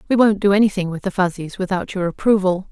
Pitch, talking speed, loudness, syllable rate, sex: 190 Hz, 220 wpm, -19 LUFS, 6.3 syllables/s, female